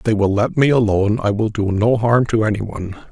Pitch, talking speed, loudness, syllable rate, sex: 110 Hz, 270 wpm, -17 LUFS, 6.2 syllables/s, male